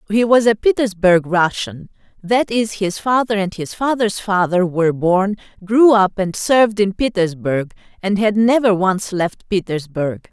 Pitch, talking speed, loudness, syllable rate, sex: 200 Hz, 155 wpm, -17 LUFS, 4.4 syllables/s, female